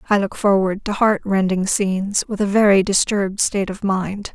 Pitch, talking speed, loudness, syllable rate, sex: 200 Hz, 180 wpm, -18 LUFS, 5.1 syllables/s, female